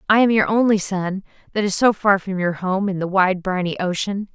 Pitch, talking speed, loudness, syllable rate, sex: 195 Hz, 235 wpm, -19 LUFS, 5.3 syllables/s, female